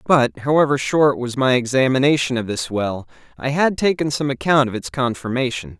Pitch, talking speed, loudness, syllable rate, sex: 135 Hz, 175 wpm, -19 LUFS, 5.2 syllables/s, male